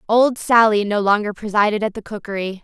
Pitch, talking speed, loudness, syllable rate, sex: 210 Hz, 180 wpm, -18 LUFS, 5.7 syllables/s, female